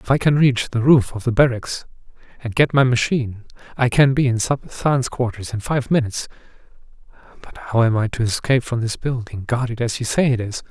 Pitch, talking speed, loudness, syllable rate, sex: 120 Hz, 215 wpm, -19 LUFS, 5.6 syllables/s, male